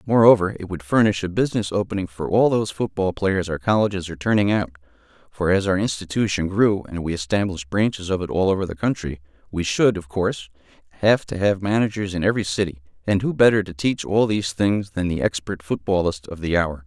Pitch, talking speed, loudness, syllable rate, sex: 95 Hz, 205 wpm, -21 LUFS, 6.1 syllables/s, male